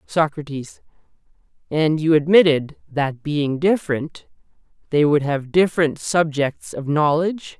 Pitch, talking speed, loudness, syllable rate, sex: 155 Hz, 110 wpm, -19 LUFS, 4.3 syllables/s, male